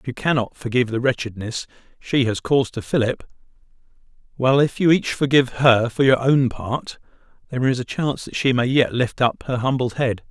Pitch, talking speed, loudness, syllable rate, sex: 125 Hz, 200 wpm, -20 LUFS, 5.6 syllables/s, male